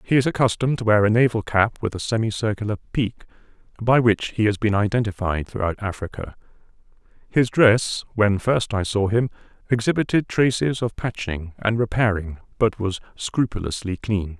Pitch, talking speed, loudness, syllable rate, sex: 110 Hz, 155 wpm, -22 LUFS, 5.2 syllables/s, male